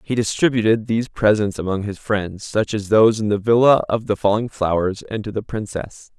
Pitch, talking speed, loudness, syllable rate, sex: 105 Hz, 205 wpm, -19 LUFS, 5.3 syllables/s, male